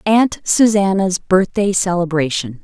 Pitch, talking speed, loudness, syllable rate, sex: 190 Hz, 90 wpm, -15 LUFS, 4.0 syllables/s, female